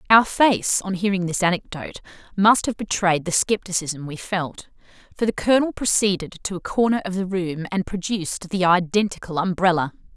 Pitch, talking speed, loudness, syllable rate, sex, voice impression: 190 Hz, 165 wpm, -21 LUFS, 5.3 syllables/s, female, feminine, very adult-like, slightly clear, fluent, slightly intellectual, slightly unique